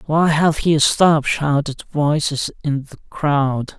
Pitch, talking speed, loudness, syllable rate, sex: 150 Hz, 145 wpm, -18 LUFS, 3.6 syllables/s, male